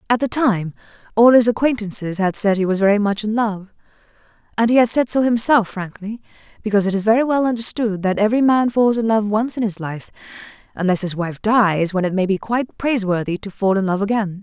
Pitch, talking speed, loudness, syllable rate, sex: 210 Hz, 210 wpm, -18 LUFS, 5.9 syllables/s, female